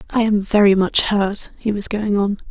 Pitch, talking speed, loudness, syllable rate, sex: 205 Hz, 215 wpm, -17 LUFS, 4.7 syllables/s, female